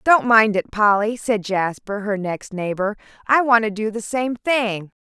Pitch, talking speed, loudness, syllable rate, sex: 215 Hz, 190 wpm, -19 LUFS, 4.2 syllables/s, female